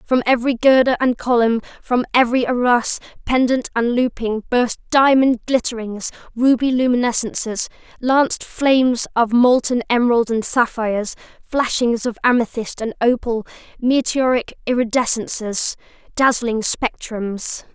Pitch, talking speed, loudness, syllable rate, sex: 240 Hz, 110 wpm, -18 LUFS, 4.6 syllables/s, female